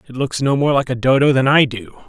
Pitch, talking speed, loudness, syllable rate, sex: 130 Hz, 290 wpm, -16 LUFS, 5.9 syllables/s, male